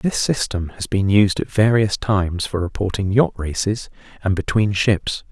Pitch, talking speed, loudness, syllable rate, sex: 100 Hz, 170 wpm, -19 LUFS, 4.5 syllables/s, male